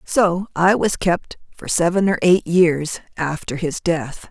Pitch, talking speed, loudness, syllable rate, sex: 170 Hz, 165 wpm, -19 LUFS, 3.7 syllables/s, female